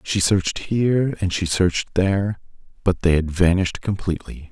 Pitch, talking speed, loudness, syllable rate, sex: 95 Hz, 160 wpm, -21 LUFS, 5.4 syllables/s, male